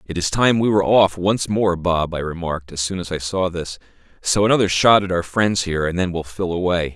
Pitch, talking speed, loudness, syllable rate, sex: 90 Hz, 250 wpm, -19 LUFS, 5.6 syllables/s, male